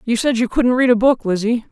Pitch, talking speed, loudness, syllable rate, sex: 235 Hz, 280 wpm, -16 LUFS, 5.7 syllables/s, female